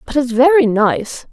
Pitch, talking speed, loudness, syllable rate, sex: 260 Hz, 180 wpm, -14 LUFS, 4.2 syllables/s, female